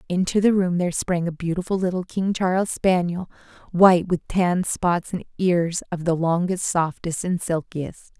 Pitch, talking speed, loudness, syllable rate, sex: 175 Hz, 170 wpm, -22 LUFS, 4.7 syllables/s, female